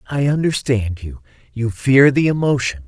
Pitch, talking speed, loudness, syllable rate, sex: 125 Hz, 145 wpm, -17 LUFS, 4.7 syllables/s, male